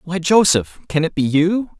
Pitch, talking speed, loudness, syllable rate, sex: 170 Hz, 200 wpm, -17 LUFS, 4.6 syllables/s, male